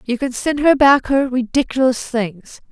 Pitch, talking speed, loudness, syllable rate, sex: 255 Hz, 175 wpm, -16 LUFS, 4.3 syllables/s, female